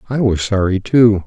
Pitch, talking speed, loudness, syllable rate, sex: 105 Hz, 190 wpm, -15 LUFS, 4.7 syllables/s, male